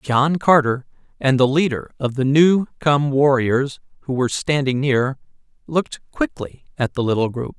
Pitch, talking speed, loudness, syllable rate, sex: 135 Hz, 160 wpm, -19 LUFS, 4.5 syllables/s, male